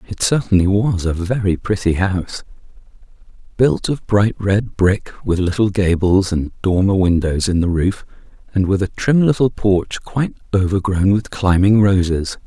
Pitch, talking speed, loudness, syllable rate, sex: 100 Hz, 155 wpm, -17 LUFS, 4.6 syllables/s, male